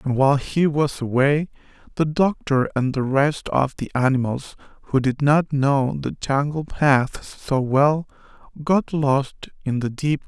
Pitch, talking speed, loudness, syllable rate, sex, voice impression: 140 Hz, 165 wpm, -21 LUFS, 4.1 syllables/s, male, masculine, adult-like, soft, slightly refreshing, friendly, reassuring, kind